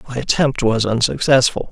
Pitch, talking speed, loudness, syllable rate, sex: 125 Hz, 140 wpm, -16 LUFS, 5.2 syllables/s, male